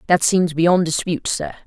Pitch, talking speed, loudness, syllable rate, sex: 170 Hz, 180 wpm, -18 LUFS, 5.1 syllables/s, female